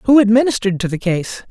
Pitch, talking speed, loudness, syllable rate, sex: 215 Hz, 200 wpm, -16 LUFS, 6.4 syllables/s, female